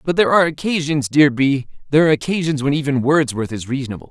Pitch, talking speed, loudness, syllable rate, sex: 140 Hz, 205 wpm, -17 LUFS, 7.2 syllables/s, male